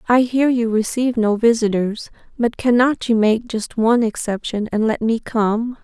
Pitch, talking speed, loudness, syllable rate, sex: 230 Hz, 175 wpm, -18 LUFS, 4.7 syllables/s, female